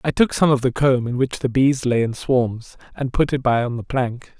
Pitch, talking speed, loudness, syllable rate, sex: 130 Hz, 275 wpm, -20 LUFS, 4.9 syllables/s, male